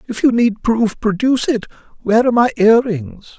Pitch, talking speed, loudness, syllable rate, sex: 220 Hz, 195 wpm, -15 LUFS, 5.5 syllables/s, male